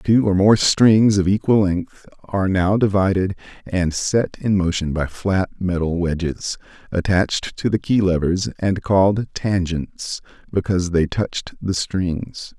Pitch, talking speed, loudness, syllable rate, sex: 95 Hz, 150 wpm, -19 LUFS, 4.1 syllables/s, male